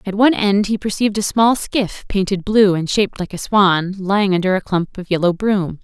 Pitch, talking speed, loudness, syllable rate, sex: 195 Hz, 225 wpm, -17 LUFS, 5.4 syllables/s, female